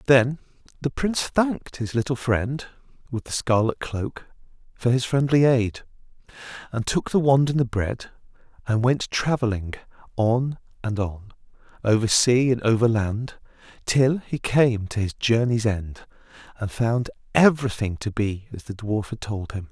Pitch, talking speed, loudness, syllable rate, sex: 120 Hz, 155 wpm, -23 LUFS, 4.4 syllables/s, male